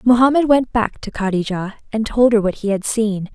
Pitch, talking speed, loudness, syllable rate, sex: 220 Hz, 215 wpm, -17 LUFS, 5.2 syllables/s, female